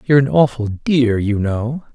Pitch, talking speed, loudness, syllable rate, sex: 125 Hz, 185 wpm, -17 LUFS, 4.5 syllables/s, male